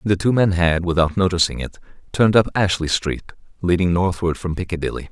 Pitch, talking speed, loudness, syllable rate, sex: 90 Hz, 175 wpm, -19 LUFS, 5.9 syllables/s, male